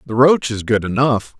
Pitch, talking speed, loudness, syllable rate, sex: 125 Hz, 215 wpm, -16 LUFS, 4.7 syllables/s, male